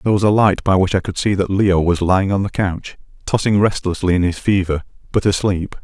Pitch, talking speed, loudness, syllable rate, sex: 95 Hz, 235 wpm, -17 LUFS, 5.8 syllables/s, male